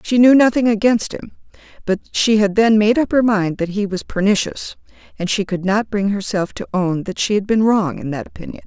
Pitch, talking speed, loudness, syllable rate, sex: 205 Hz, 230 wpm, -17 LUFS, 5.4 syllables/s, female